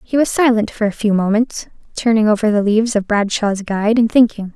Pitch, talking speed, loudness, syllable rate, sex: 215 Hz, 210 wpm, -16 LUFS, 5.7 syllables/s, female